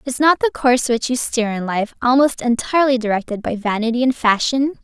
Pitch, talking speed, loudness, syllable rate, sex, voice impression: 245 Hz, 200 wpm, -18 LUFS, 5.8 syllables/s, female, feminine, slightly young, tensed, powerful, bright, clear, fluent, slightly intellectual, friendly, elegant, lively, slightly sharp